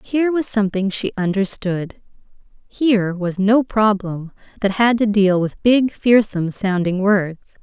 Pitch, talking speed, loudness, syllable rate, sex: 205 Hz, 140 wpm, -18 LUFS, 4.3 syllables/s, female